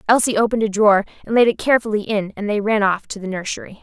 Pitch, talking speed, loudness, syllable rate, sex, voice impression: 210 Hz, 250 wpm, -18 LUFS, 7.3 syllables/s, female, very feminine, very young, very thin, very tensed, very powerful, very bright, hard, very clear, very fluent, slightly raspy, very cute, slightly intellectual, very refreshing, sincere, slightly calm, very friendly, very reassuring, very unique, slightly elegant, wild, sweet, very lively, very intense, sharp, very light